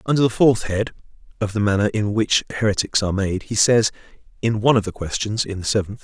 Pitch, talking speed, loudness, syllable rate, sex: 105 Hz, 220 wpm, -20 LUFS, 6.1 syllables/s, male